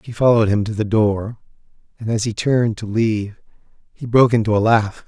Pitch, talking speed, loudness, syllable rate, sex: 110 Hz, 200 wpm, -18 LUFS, 6.0 syllables/s, male